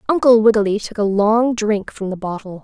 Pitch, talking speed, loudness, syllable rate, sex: 215 Hz, 205 wpm, -17 LUFS, 5.3 syllables/s, female